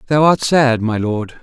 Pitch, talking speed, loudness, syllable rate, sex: 125 Hz, 210 wpm, -15 LUFS, 4.1 syllables/s, male